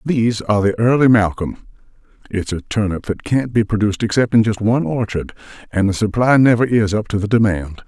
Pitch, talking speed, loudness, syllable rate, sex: 110 Hz, 190 wpm, -17 LUFS, 5.8 syllables/s, male